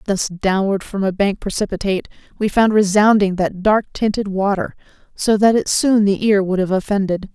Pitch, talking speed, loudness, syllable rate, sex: 200 Hz, 180 wpm, -17 LUFS, 5.1 syllables/s, female